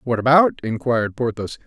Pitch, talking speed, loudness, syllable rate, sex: 120 Hz, 145 wpm, -19 LUFS, 5.4 syllables/s, male